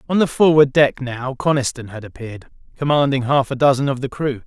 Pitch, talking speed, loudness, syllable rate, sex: 135 Hz, 200 wpm, -17 LUFS, 5.8 syllables/s, male